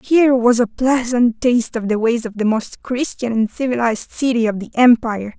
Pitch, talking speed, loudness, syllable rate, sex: 235 Hz, 200 wpm, -17 LUFS, 5.4 syllables/s, female